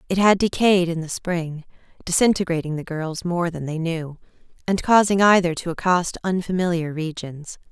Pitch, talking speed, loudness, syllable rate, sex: 175 Hz, 155 wpm, -21 LUFS, 4.9 syllables/s, female